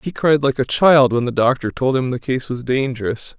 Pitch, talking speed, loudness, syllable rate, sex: 130 Hz, 250 wpm, -17 LUFS, 5.2 syllables/s, male